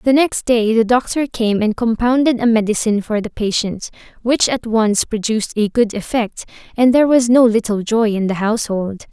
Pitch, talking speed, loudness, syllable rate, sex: 225 Hz, 190 wpm, -16 LUFS, 5.2 syllables/s, female